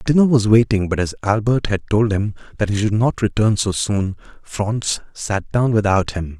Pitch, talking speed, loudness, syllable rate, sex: 105 Hz, 195 wpm, -18 LUFS, 4.7 syllables/s, male